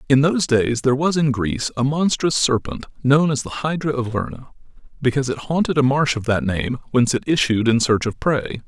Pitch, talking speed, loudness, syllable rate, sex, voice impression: 130 Hz, 215 wpm, -19 LUFS, 5.7 syllables/s, male, very masculine, middle-aged, thick, tensed, very powerful, bright, hard, very clear, very fluent, slightly raspy, very cool, very intellectual, refreshing, very sincere, calm, mature, very friendly, very reassuring, very unique, slightly elegant, wild, sweet, very lively, kind, slightly intense